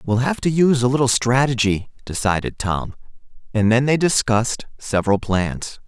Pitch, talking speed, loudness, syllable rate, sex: 120 Hz, 155 wpm, -19 LUFS, 5.1 syllables/s, male